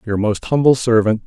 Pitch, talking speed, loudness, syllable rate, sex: 115 Hz, 190 wpm, -16 LUFS, 5.3 syllables/s, male